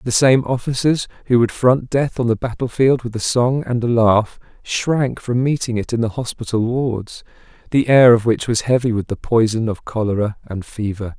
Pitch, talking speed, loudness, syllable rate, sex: 120 Hz, 200 wpm, -18 LUFS, 4.9 syllables/s, male